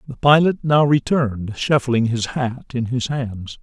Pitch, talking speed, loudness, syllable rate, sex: 130 Hz, 165 wpm, -19 LUFS, 4.2 syllables/s, male